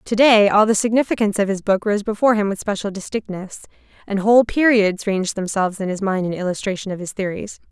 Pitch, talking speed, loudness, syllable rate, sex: 205 Hz, 200 wpm, -19 LUFS, 6.4 syllables/s, female